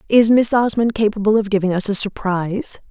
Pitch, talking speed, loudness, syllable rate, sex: 210 Hz, 185 wpm, -17 LUFS, 5.6 syllables/s, female